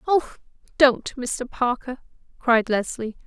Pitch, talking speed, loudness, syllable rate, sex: 255 Hz, 110 wpm, -22 LUFS, 3.5 syllables/s, female